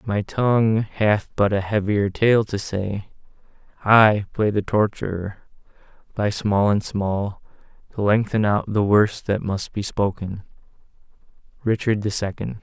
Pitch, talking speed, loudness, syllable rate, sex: 105 Hz, 140 wpm, -21 LUFS, 4.0 syllables/s, male